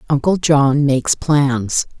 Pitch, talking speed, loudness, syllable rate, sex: 140 Hz, 120 wpm, -15 LUFS, 3.5 syllables/s, female